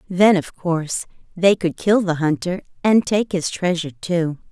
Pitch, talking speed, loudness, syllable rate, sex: 175 Hz, 175 wpm, -19 LUFS, 4.6 syllables/s, female